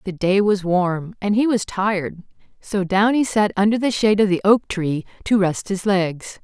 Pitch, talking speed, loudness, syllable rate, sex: 195 Hz, 215 wpm, -19 LUFS, 4.6 syllables/s, female